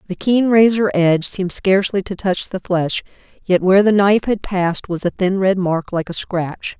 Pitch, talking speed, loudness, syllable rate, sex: 190 Hz, 210 wpm, -17 LUFS, 5.2 syllables/s, female